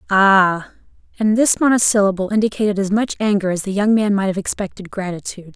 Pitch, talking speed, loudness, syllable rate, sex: 200 Hz, 160 wpm, -17 LUFS, 6.0 syllables/s, female